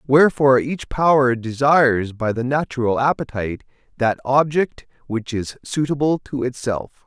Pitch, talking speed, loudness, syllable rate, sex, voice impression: 130 Hz, 125 wpm, -19 LUFS, 4.8 syllables/s, male, masculine, middle-aged, powerful, halting, mature, friendly, reassuring, wild, lively, kind, slightly intense